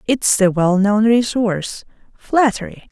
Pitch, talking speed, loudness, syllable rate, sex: 210 Hz, 80 wpm, -16 LUFS, 4.0 syllables/s, female